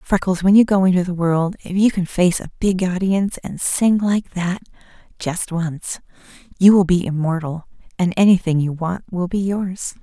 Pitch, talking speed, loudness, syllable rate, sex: 185 Hz, 185 wpm, -18 LUFS, 4.8 syllables/s, female